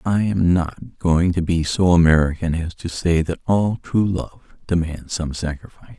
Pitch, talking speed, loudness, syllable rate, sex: 85 Hz, 180 wpm, -20 LUFS, 4.4 syllables/s, male